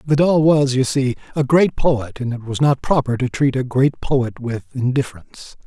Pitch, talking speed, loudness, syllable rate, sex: 130 Hz, 200 wpm, -18 LUFS, 4.9 syllables/s, male